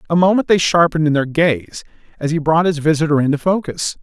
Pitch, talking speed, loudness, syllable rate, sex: 160 Hz, 210 wpm, -16 LUFS, 6.1 syllables/s, male